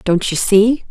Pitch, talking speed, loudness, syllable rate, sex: 205 Hz, 200 wpm, -14 LUFS, 3.9 syllables/s, female